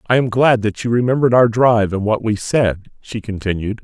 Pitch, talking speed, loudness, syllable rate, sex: 110 Hz, 220 wpm, -16 LUFS, 5.7 syllables/s, male